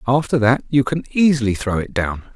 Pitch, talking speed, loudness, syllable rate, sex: 125 Hz, 205 wpm, -18 LUFS, 5.5 syllables/s, male